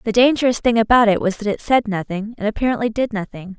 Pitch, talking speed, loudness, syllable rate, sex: 220 Hz, 235 wpm, -18 LUFS, 6.4 syllables/s, female